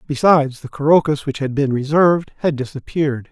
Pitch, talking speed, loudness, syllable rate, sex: 145 Hz, 165 wpm, -17 LUFS, 5.9 syllables/s, male